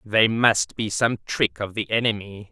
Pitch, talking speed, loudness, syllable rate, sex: 105 Hz, 190 wpm, -22 LUFS, 4.2 syllables/s, male